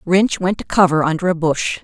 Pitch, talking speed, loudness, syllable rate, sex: 175 Hz, 230 wpm, -17 LUFS, 5.2 syllables/s, female